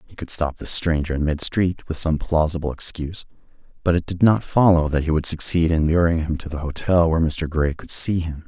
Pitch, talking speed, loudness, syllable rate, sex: 80 Hz, 235 wpm, -20 LUFS, 5.5 syllables/s, male